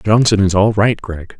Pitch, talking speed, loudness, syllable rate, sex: 100 Hz, 215 wpm, -14 LUFS, 4.4 syllables/s, male